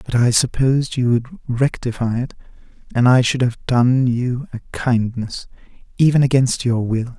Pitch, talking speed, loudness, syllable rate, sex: 125 Hz, 160 wpm, -18 LUFS, 4.5 syllables/s, male